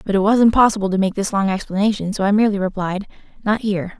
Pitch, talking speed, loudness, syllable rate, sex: 200 Hz, 225 wpm, -18 LUFS, 7.1 syllables/s, female